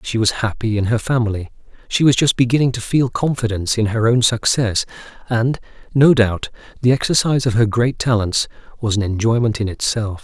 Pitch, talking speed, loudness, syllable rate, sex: 115 Hz, 180 wpm, -17 LUFS, 5.6 syllables/s, male